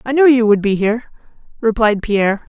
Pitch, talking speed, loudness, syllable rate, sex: 225 Hz, 190 wpm, -15 LUFS, 5.8 syllables/s, female